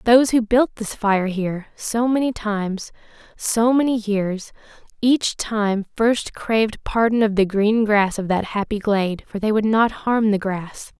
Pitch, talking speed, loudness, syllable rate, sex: 215 Hz, 175 wpm, -20 LUFS, 4.2 syllables/s, female